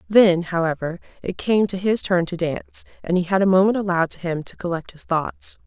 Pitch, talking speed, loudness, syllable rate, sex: 180 Hz, 225 wpm, -21 LUFS, 5.6 syllables/s, female